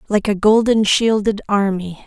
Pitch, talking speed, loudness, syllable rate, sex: 205 Hz, 145 wpm, -16 LUFS, 4.4 syllables/s, female